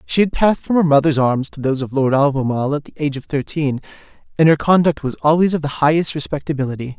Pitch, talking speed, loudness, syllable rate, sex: 150 Hz, 225 wpm, -17 LUFS, 6.7 syllables/s, male